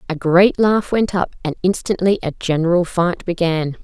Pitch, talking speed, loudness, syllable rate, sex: 180 Hz, 170 wpm, -17 LUFS, 4.8 syllables/s, female